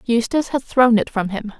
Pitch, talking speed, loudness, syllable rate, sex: 235 Hz, 225 wpm, -18 LUFS, 5.4 syllables/s, female